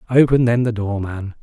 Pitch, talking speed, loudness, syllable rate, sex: 115 Hz, 210 wpm, -18 LUFS, 5.1 syllables/s, male